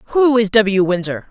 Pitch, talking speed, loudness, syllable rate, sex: 210 Hz, 185 wpm, -15 LUFS, 5.0 syllables/s, female